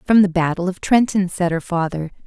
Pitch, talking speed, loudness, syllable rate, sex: 180 Hz, 210 wpm, -19 LUFS, 5.6 syllables/s, female